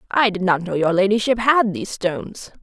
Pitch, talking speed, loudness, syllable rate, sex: 200 Hz, 205 wpm, -19 LUFS, 5.6 syllables/s, female